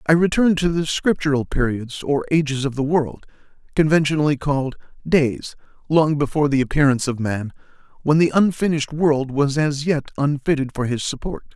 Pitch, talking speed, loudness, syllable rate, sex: 145 Hz, 160 wpm, -20 LUFS, 5.5 syllables/s, male